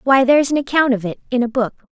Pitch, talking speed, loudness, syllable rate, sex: 255 Hz, 315 wpm, -17 LUFS, 7.7 syllables/s, female